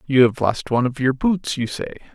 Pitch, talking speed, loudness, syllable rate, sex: 135 Hz, 250 wpm, -20 LUFS, 5.8 syllables/s, male